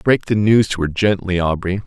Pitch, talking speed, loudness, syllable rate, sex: 95 Hz, 225 wpm, -17 LUFS, 5.2 syllables/s, male